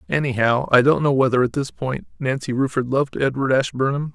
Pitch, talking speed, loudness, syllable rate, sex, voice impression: 135 Hz, 190 wpm, -20 LUFS, 5.7 syllables/s, male, masculine, middle-aged, thick, cool, slightly intellectual, slightly calm